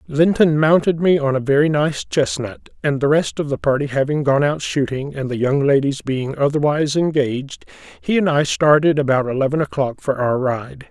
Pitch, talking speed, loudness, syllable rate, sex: 145 Hz, 195 wpm, -18 LUFS, 5.2 syllables/s, male